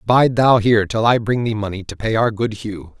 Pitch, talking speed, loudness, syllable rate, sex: 110 Hz, 260 wpm, -17 LUFS, 5.2 syllables/s, male